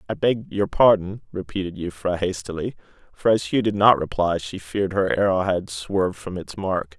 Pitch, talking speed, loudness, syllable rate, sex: 95 Hz, 190 wpm, -22 LUFS, 5.1 syllables/s, male